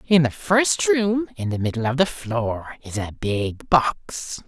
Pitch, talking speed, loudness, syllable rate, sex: 145 Hz, 190 wpm, -22 LUFS, 3.7 syllables/s, male